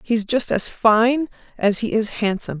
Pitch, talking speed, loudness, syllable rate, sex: 220 Hz, 185 wpm, -19 LUFS, 4.5 syllables/s, female